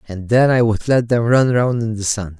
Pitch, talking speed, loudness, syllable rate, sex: 115 Hz, 275 wpm, -16 LUFS, 5.0 syllables/s, male